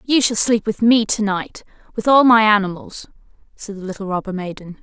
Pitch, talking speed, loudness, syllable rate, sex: 210 Hz, 200 wpm, -17 LUFS, 5.3 syllables/s, female